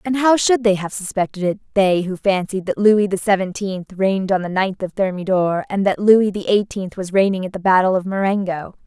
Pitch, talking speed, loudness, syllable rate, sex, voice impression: 195 Hz, 215 wpm, -18 LUFS, 5.3 syllables/s, female, feminine, adult-like, tensed, slightly intellectual, slightly unique, slightly intense